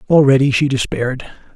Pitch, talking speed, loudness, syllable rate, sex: 135 Hz, 115 wpm, -15 LUFS, 6.1 syllables/s, male